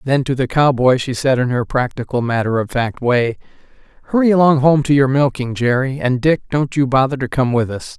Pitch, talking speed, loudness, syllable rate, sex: 130 Hz, 220 wpm, -16 LUFS, 5.4 syllables/s, male